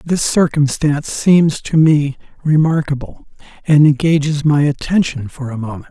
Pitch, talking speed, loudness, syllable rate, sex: 150 Hz, 130 wpm, -15 LUFS, 4.6 syllables/s, male